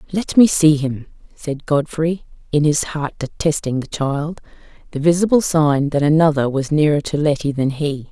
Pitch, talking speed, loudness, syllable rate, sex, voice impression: 150 Hz, 165 wpm, -18 LUFS, 4.7 syllables/s, female, slightly feminine, adult-like, intellectual, calm